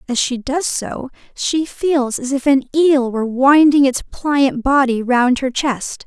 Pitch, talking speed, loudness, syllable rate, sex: 265 Hz, 180 wpm, -16 LUFS, 3.8 syllables/s, female